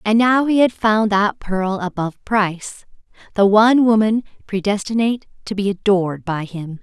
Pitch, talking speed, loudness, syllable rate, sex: 205 Hz, 160 wpm, -18 LUFS, 5.0 syllables/s, female